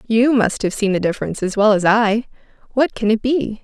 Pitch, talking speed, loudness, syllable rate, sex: 220 Hz, 230 wpm, -17 LUFS, 5.6 syllables/s, female